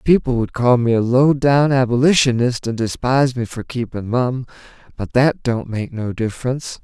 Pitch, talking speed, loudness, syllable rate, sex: 125 Hz, 175 wpm, -18 LUFS, 5.0 syllables/s, male